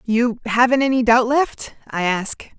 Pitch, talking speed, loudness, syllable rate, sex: 235 Hz, 165 wpm, -18 LUFS, 4.1 syllables/s, female